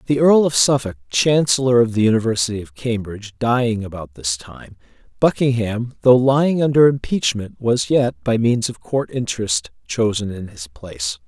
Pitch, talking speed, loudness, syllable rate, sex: 120 Hz, 160 wpm, -18 LUFS, 5.0 syllables/s, male